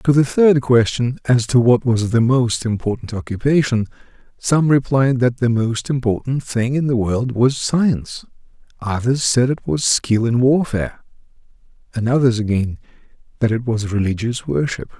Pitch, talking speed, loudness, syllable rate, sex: 120 Hz, 155 wpm, -18 LUFS, 4.7 syllables/s, male